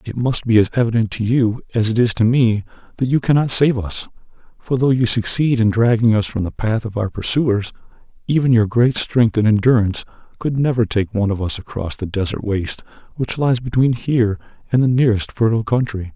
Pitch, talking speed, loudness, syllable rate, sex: 115 Hz, 205 wpm, -18 LUFS, 5.8 syllables/s, male